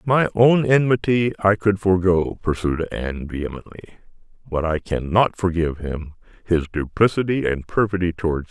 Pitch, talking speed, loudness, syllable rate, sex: 95 Hz, 140 wpm, -20 LUFS, 5.3 syllables/s, male